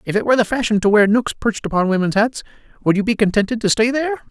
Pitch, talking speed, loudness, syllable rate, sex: 210 Hz, 265 wpm, -17 LUFS, 7.2 syllables/s, male